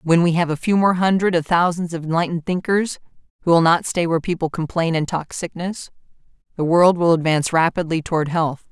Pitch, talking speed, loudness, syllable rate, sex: 170 Hz, 200 wpm, -19 LUFS, 5.9 syllables/s, female